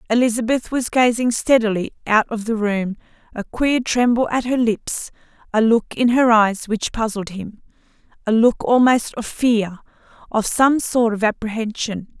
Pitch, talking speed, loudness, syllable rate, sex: 225 Hz, 155 wpm, -18 LUFS, 4.4 syllables/s, female